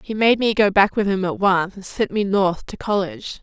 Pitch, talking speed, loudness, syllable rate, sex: 200 Hz, 265 wpm, -19 LUFS, 5.2 syllables/s, female